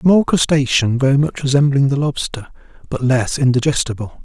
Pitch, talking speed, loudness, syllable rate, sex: 135 Hz, 155 wpm, -16 LUFS, 5.6 syllables/s, male